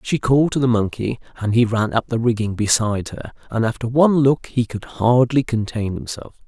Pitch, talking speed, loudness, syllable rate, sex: 115 Hz, 205 wpm, -19 LUFS, 5.5 syllables/s, male